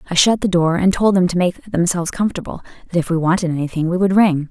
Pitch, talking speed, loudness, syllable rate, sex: 175 Hz, 255 wpm, -17 LUFS, 6.6 syllables/s, female